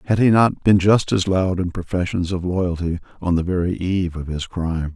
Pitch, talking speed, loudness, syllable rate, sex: 90 Hz, 220 wpm, -20 LUFS, 5.3 syllables/s, male